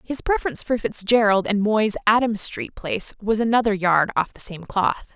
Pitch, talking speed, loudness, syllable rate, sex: 215 Hz, 185 wpm, -21 LUFS, 5.2 syllables/s, female